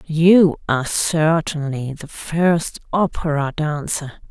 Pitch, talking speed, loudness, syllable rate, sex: 155 Hz, 100 wpm, -19 LUFS, 3.4 syllables/s, female